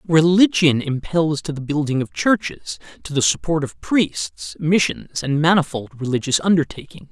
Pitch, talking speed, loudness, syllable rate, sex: 150 Hz, 145 wpm, -19 LUFS, 4.6 syllables/s, male